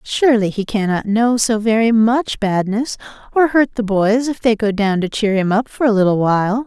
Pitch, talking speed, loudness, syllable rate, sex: 220 Hz, 215 wpm, -16 LUFS, 5.0 syllables/s, female